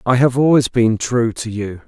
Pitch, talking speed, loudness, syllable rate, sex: 120 Hz, 225 wpm, -16 LUFS, 4.6 syllables/s, male